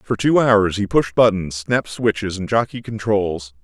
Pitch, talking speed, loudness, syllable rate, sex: 105 Hz, 180 wpm, -18 LUFS, 4.5 syllables/s, male